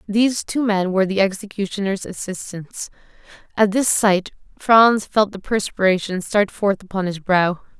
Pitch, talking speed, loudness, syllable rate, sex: 200 Hz, 145 wpm, -19 LUFS, 4.7 syllables/s, female